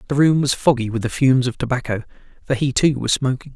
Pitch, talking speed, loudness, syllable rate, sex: 130 Hz, 235 wpm, -19 LUFS, 6.5 syllables/s, male